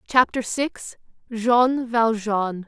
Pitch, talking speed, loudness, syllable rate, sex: 230 Hz, 65 wpm, -21 LUFS, 2.8 syllables/s, female